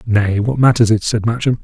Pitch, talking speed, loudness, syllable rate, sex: 115 Hz, 220 wpm, -15 LUFS, 5.3 syllables/s, male